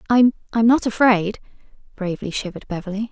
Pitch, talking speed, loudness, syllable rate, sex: 210 Hz, 115 wpm, -20 LUFS, 6.5 syllables/s, female